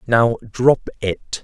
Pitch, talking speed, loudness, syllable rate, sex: 115 Hz, 125 wpm, -18 LUFS, 2.7 syllables/s, male